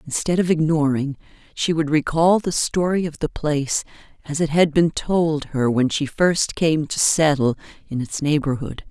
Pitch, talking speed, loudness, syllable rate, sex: 155 Hz, 175 wpm, -20 LUFS, 4.6 syllables/s, female